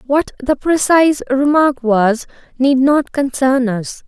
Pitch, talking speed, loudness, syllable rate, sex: 270 Hz, 135 wpm, -15 LUFS, 3.7 syllables/s, female